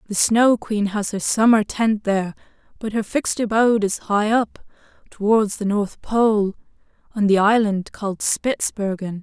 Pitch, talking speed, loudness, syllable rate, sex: 210 Hz, 155 wpm, -20 LUFS, 4.5 syllables/s, female